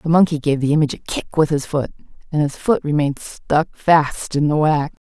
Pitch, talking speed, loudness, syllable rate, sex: 150 Hz, 225 wpm, -18 LUFS, 5.3 syllables/s, female